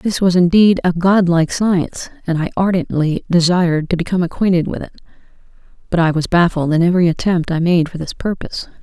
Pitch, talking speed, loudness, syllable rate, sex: 175 Hz, 185 wpm, -16 LUFS, 6.1 syllables/s, female